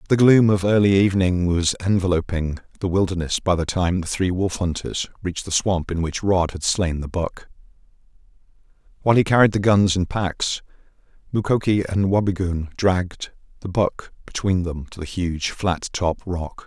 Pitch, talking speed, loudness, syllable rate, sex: 90 Hz, 170 wpm, -21 LUFS, 4.9 syllables/s, male